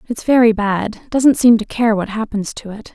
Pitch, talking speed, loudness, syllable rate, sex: 220 Hz, 225 wpm, -15 LUFS, 4.8 syllables/s, female